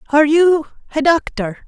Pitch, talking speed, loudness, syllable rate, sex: 300 Hz, 145 wpm, -16 LUFS, 5.0 syllables/s, female